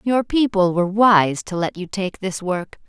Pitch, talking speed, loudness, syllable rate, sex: 195 Hz, 210 wpm, -19 LUFS, 4.4 syllables/s, female